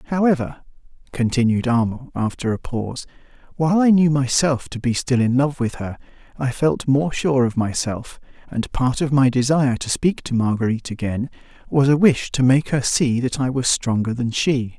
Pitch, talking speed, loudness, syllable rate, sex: 130 Hz, 185 wpm, -20 LUFS, 4.5 syllables/s, male